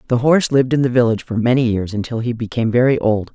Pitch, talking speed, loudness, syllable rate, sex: 120 Hz, 250 wpm, -17 LUFS, 7.3 syllables/s, female